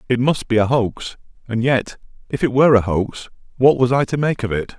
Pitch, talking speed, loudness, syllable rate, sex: 120 Hz, 240 wpm, -18 LUFS, 5.4 syllables/s, male